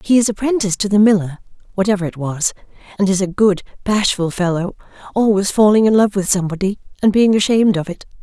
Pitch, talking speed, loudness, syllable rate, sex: 200 Hz, 190 wpm, -16 LUFS, 6.4 syllables/s, female